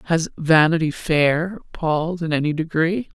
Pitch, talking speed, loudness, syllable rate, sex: 160 Hz, 130 wpm, -20 LUFS, 4.4 syllables/s, female